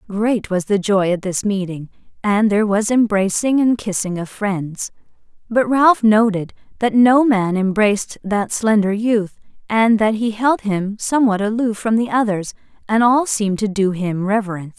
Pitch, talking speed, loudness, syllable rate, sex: 210 Hz, 170 wpm, -17 LUFS, 4.6 syllables/s, female